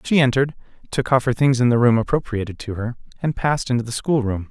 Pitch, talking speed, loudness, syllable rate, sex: 125 Hz, 225 wpm, -20 LUFS, 6.5 syllables/s, male